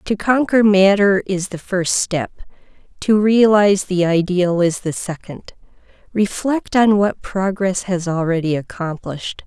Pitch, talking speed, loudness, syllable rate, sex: 190 Hz, 135 wpm, -17 LUFS, 4.2 syllables/s, female